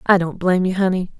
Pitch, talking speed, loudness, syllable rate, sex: 180 Hz, 250 wpm, -18 LUFS, 6.7 syllables/s, female